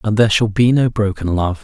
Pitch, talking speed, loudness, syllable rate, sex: 105 Hz, 260 wpm, -15 LUFS, 5.9 syllables/s, male